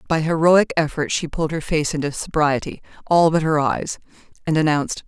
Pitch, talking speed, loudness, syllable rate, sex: 155 Hz, 155 wpm, -20 LUFS, 5.6 syllables/s, female